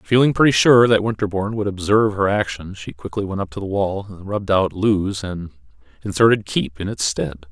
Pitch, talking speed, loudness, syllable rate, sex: 100 Hz, 200 wpm, -19 LUFS, 5.4 syllables/s, male